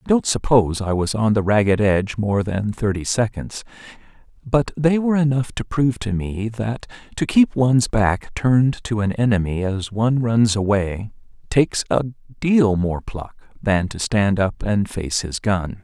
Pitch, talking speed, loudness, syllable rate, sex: 110 Hz, 180 wpm, -20 LUFS, 4.6 syllables/s, male